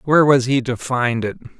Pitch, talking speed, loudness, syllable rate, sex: 130 Hz, 225 wpm, -18 LUFS, 5.5 syllables/s, male